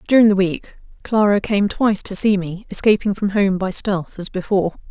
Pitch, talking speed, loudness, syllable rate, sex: 200 Hz, 185 wpm, -18 LUFS, 5.3 syllables/s, female